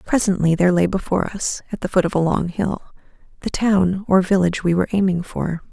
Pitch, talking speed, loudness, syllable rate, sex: 185 Hz, 210 wpm, -19 LUFS, 6.0 syllables/s, female